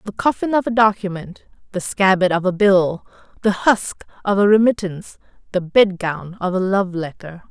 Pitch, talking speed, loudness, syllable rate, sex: 190 Hz, 175 wpm, -18 LUFS, 4.9 syllables/s, female